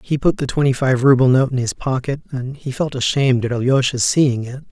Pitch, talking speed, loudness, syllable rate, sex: 130 Hz, 230 wpm, -18 LUFS, 5.6 syllables/s, male